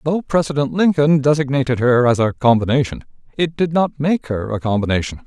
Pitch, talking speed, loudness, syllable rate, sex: 135 Hz, 170 wpm, -17 LUFS, 5.8 syllables/s, male